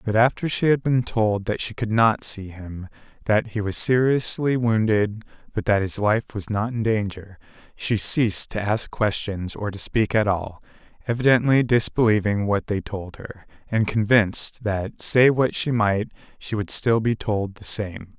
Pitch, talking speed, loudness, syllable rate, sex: 110 Hz, 180 wpm, -22 LUFS, 4.4 syllables/s, male